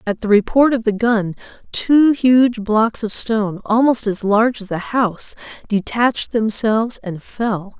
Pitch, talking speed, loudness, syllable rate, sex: 220 Hz, 160 wpm, -17 LUFS, 4.4 syllables/s, female